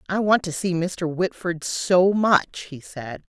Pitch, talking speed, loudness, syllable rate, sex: 175 Hz, 180 wpm, -21 LUFS, 3.6 syllables/s, female